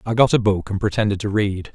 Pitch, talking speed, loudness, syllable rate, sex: 105 Hz, 275 wpm, -20 LUFS, 6.1 syllables/s, male